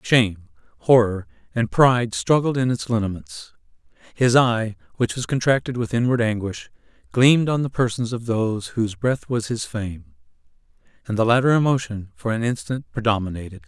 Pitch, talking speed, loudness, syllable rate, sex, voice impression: 110 Hz, 155 wpm, -21 LUFS, 5.3 syllables/s, male, masculine, adult-like, tensed, bright, clear, fluent, cool, intellectual, refreshing, friendly, reassuring, wild, lively, kind